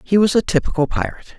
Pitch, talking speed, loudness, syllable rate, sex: 165 Hz, 215 wpm, -18 LUFS, 7.0 syllables/s, male